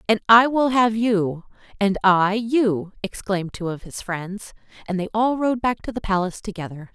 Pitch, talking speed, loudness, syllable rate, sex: 205 Hz, 190 wpm, -21 LUFS, 4.8 syllables/s, female